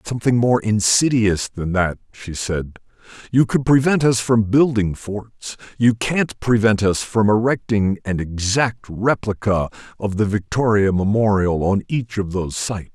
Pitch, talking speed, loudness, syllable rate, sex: 110 Hz, 150 wpm, -19 LUFS, 4.4 syllables/s, male